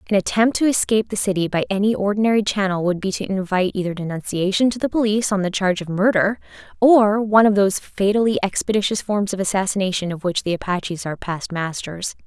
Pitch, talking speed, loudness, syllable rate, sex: 200 Hz, 195 wpm, -20 LUFS, 6.5 syllables/s, female